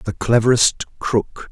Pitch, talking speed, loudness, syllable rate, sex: 110 Hz, 120 wpm, -18 LUFS, 3.9 syllables/s, male